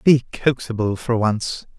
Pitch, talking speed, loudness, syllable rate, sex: 115 Hz, 135 wpm, -21 LUFS, 4.6 syllables/s, male